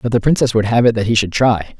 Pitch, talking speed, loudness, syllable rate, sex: 115 Hz, 335 wpm, -15 LUFS, 6.7 syllables/s, male